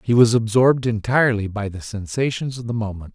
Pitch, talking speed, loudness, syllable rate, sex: 115 Hz, 190 wpm, -20 LUFS, 5.9 syllables/s, male